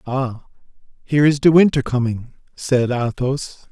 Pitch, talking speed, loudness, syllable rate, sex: 130 Hz, 130 wpm, -18 LUFS, 4.5 syllables/s, male